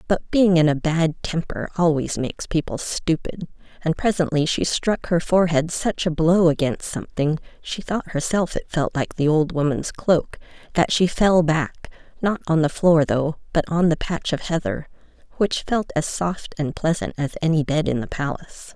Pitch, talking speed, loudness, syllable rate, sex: 165 Hz, 175 wpm, -21 LUFS, 4.7 syllables/s, female